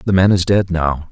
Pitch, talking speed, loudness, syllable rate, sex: 90 Hz, 270 wpm, -15 LUFS, 5.2 syllables/s, male